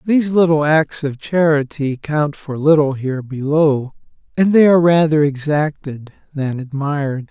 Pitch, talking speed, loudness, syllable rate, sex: 150 Hz, 140 wpm, -16 LUFS, 4.6 syllables/s, male